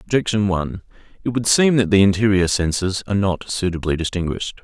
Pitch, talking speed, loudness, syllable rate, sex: 100 Hz, 170 wpm, -19 LUFS, 6.0 syllables/s, male